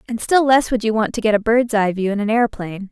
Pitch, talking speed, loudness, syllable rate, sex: 220 Hz, 310 wpm, -17 LUFS, 6.6 syllables/s, female